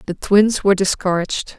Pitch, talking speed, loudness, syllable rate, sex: 190 Hz, 150 wpm, -17 LUFS, 5.6 syllables/s, female